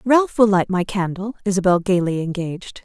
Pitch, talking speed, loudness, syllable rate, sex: 195 Hz, 170 wpm, -19 LUFS, 5.3 syllables/s, female